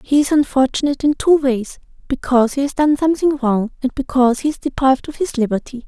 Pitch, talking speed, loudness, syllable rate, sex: 270 Hz, 195 wpm, -17 LUFS, 6.3 syllables/s, female